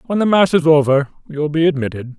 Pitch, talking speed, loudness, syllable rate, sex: 155 Hz, 220 wpm, -15 LUFS, 6.0 syllables/s, male